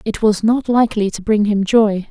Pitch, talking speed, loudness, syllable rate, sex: 215 Hz, 230 wpm, -16 LUFS, 5.0 syllables/s, female